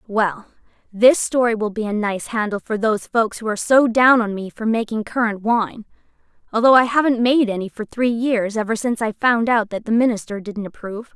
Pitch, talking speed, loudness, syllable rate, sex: 225 Hz, 210 wpm, -19 LUFS, 5.5 syllables/s, female